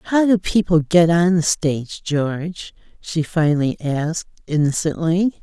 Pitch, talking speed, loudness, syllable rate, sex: 165 Hz, 135 wpm, -19 LUFS, 4.3 syllables/s, female